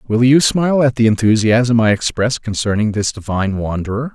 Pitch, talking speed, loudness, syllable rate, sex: 115 Hz, 175 wpm, -15 LUFS, 5.4 syllables/s, male